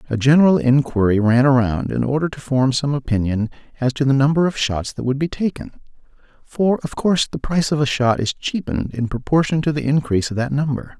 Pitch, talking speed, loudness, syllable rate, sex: 135 Hz, 215 wpm, -19 LUFS, 6.0 syllables/s, male